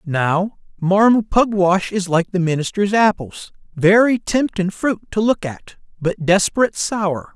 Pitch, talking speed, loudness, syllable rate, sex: 195 Hz, 140 wpm, -17 LUFS, 4.1 syllables/s, male